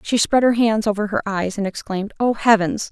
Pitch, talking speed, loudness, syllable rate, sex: 210 Hz, 225 wpm, -19 LUFS, 5.5 syllables/s, female